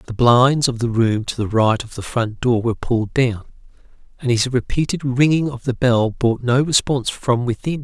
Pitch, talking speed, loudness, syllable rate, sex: 125 Hz, 205 wpm, -18 LUFS, 4.9 syllables/s, male